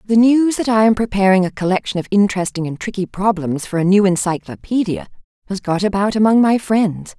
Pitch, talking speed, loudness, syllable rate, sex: 200 Hz, 190 wpm, -16 LUFS, 5.8 syllables/s, female